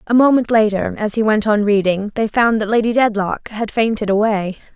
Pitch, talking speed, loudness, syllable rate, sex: 215 Hz, 200 wpm, -16 LUFS, 5.2 syllables/s, female